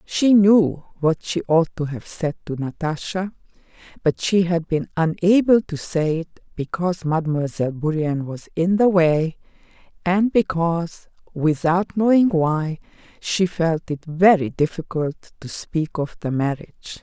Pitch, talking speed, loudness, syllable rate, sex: 170 Hz, 140 wpm, -21 LUFS, 4.4 syllables/s, female